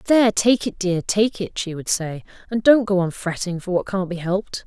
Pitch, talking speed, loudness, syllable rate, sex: 190 Hz, 245 wpm, -21 LUFS, 5.2 syllables/s, female